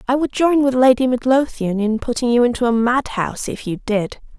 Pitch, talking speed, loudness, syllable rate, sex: 245 Hz, 205 wpm, -18 LUFS, 5.4 syllables/s, female